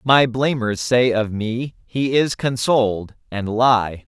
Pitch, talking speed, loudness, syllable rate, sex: 120 Hz, 145 wpm, -19 LUFS, 3.5 syllables/s, male